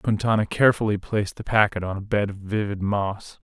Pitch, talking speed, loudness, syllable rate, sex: 100 Hz, 190 wpm, -23 LUFS, 5.6 syllables/s, male